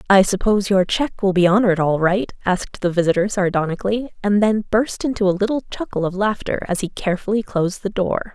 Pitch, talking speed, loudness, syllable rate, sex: 195 Hz, 200 wpm, -19 LUFS, 6.2 syllables/s, female